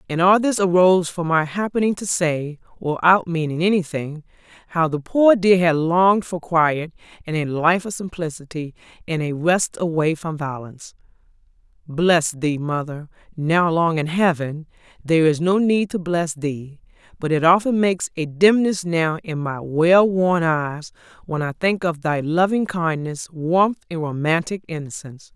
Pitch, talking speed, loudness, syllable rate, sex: 165 Hz, 160 wpm, -20 LUFS, 4.5 syllables/s, female